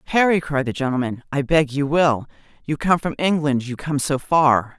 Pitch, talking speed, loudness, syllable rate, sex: 145 Hz, 190 wpm, -20 LUFS, 4.8 syllables/s, female